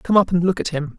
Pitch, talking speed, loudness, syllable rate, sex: 180 Hz, 365 wpm, -19 LUFS, 6.3 syllables/s, female